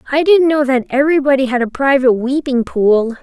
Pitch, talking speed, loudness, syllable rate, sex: 270 Hz, 185 wpm, -14 LUFS, 5.8 syllables/s, female